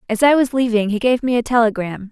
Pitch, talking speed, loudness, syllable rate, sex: 235 Hz, 255 wpm, -17 LUFS, 6.2 syllables/s, female